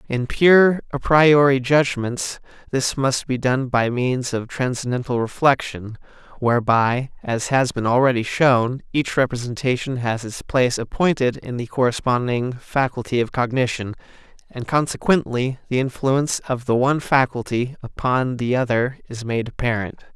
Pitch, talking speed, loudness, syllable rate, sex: 125 Hz, 135 wpm, -20 LUFS, 4.7 syllables/s, male